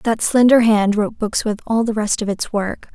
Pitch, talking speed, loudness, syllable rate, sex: 215 Hz, 245 wpm, -17 LUFS, 4.9 syllables/s, female